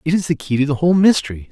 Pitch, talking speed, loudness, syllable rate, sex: 150 Hz, 315 wpm, -16 LUFS, 7.8 syllables/s, male